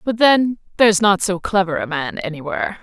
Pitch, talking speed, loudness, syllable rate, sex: 195 Hz, 215 wpm, -17 LUFS, 5.9 syllables/s, female